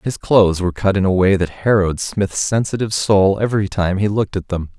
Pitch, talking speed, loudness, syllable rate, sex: 100 Hz, 225 wpm, -17 LUFS, 6.1 syllables/s, male